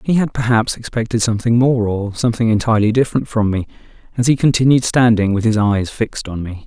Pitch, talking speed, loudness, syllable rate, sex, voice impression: 115 Hz, 200 wpm, -16 LUFS, 6.3 syllables/s, male, masculine, adult-like, slightly muffled, fluent, cool, sincere, slightly calm